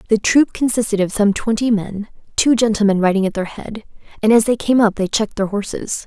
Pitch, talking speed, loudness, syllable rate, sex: 215 Hz, 220 wpm, -17 LUFS, 5.8 syllables/s, female